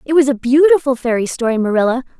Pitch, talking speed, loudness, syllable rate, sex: 260 Hz, 190 wpm, -15 LUFS, 6.7 syllables/s, female